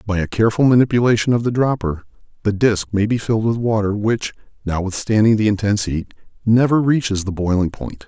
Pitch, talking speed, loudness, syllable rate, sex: 110 Hz, 180 wpm, -18 LUFS, 6.0 syllables/s, male